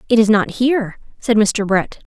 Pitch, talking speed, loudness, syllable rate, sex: 220 Hz, 200 wpm, -16 LUFS, 4.8 syllables/s, female